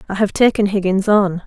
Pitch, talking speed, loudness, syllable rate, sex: 200 Hz, 205 wpm, -16 LUFS, 5.5 syllables/s, female